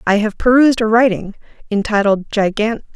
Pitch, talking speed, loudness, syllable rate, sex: 220 Hz, 140 wpm, -15 LUFS, 5.7 syllables/s, female